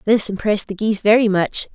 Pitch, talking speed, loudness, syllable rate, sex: 210 Hz, 205 wpm, -18 LUFS, 6.4 syllables/s, female